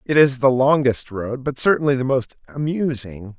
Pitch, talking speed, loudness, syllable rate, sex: 130 Hz, 175 wpm, -19 LUFS, 4.7 syllables/s, male